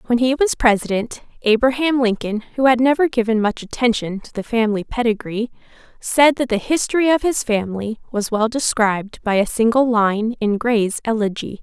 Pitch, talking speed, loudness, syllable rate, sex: 230 Hz, 170 wpm, -18 LUFS, 5.2 syllables/s, female